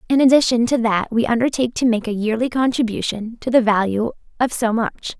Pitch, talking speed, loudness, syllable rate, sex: 230 Hz, 195 wpm, -18 LUFS, 5.7 syllables/s, female